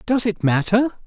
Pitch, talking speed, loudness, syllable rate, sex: 210 Hz, 170 wpm, -19 LUFS, 4.8 syllables/s, male